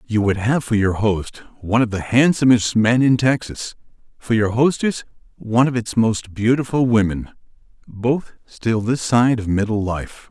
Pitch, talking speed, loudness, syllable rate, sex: 115 Hz, 165 wpm, -18 LUFS, 4.5 syllables/s, male